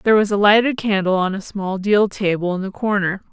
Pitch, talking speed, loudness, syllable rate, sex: 200 Hz, 235 wpm, -18 LUFS, 5.5 syllables/s, female